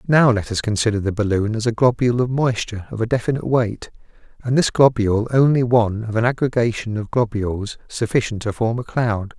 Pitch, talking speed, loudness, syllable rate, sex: 115 Hz, 190 wpm, -19 LUFS, 5.9 syllables/s, male